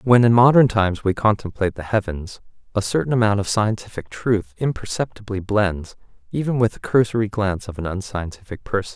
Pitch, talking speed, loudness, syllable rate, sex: 105 Hz, 165 wpm, -20 LUFS, 5.7 syllables/s, male